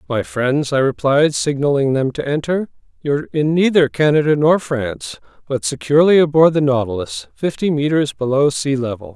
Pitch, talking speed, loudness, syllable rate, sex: 145 Hz, 155 wpm, -17 LUFS, 5.2 syllables/s, male